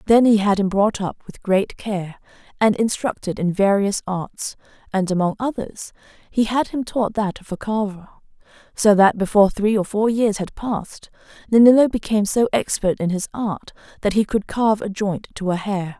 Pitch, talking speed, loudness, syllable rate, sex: 205 Hz, 190 wpm, -20 LUFS, 5.0 syllables/s, female